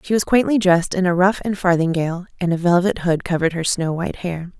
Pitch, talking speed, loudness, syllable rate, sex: 180 Hz, 235 wpm, -19 LUFS, 6.3 syllables/s, female